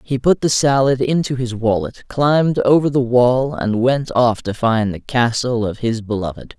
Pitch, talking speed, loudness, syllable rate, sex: 125 Hz, 190 wpm, -17 LUFS, 4.5 syllables/s, male